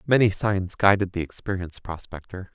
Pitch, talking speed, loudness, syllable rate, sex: 95 Hz, 140 wpm, -24 LUFS, 5.4 syllables/s, male